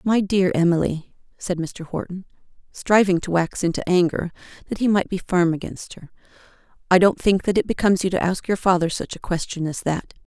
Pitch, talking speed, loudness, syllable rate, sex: 180 Hz, 200 wpm, -21 LUFS, 5.5 syllables/s, female